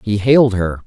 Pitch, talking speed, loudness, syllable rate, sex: 110 Hz, 205 wpm, -14 LUFS, 5.2 syllables/s, male